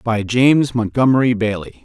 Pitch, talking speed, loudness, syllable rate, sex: 120 Hz, 130 wpm, -16 LUFS, 5.0 syllables/s, male